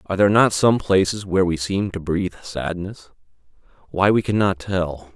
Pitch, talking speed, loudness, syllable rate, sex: 95 Hz, 165 wpm, -20 LUFS, 5.4 syllables/s, male